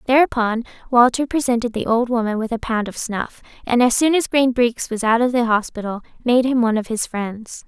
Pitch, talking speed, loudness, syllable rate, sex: 235 Hz, 220 wpm, -19 LUFS, 5.5 syllables/s, female